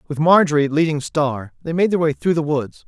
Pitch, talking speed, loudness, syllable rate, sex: 155 Hz, 230 wpm, -18 LUFS, 5.4 syllables/s, male